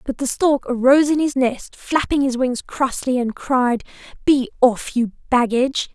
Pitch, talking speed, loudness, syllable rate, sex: 260 Hz, 170 wpm, -19 LUFS, 4.6 syllables/s, female